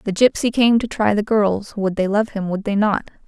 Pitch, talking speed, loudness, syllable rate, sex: 210 Hz, 255 wpm, -19 LUFS, 5.2 syllables/s, female